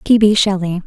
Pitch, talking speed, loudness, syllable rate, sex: 195 Hz, 210 wpm, -14 LUFS, 5.3 syllables/s, female